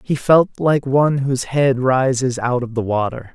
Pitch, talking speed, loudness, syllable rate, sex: 130 Hz, 195 wpm, -17 LUFS, 4.7 syllables/s, male